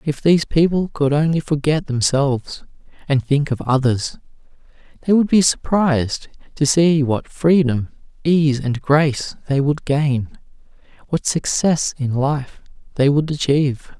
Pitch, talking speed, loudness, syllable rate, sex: 145 Hz, 135 wpm, -18 LUFS, 4.3 syllables/s, male